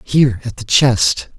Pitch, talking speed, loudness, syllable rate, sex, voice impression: 120 Hz, 175 wpm, -14 LUFS, 4.1 syllables/s, male, very masculine, slightly old, very thick, slightly tensed, slightly powerful, bright, soft, clear, fluent, slightly raspy, cool, intellectual, slightly refreshing, sincere, calm, friendly, very reassuring, unique, slightly elegant, wild, slightly sweet, lively, kind, slightly modest